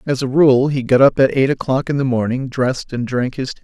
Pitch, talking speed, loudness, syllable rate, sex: 130 Hz, 280 wpm, -16 LUFS, 5.7 syllables/s, male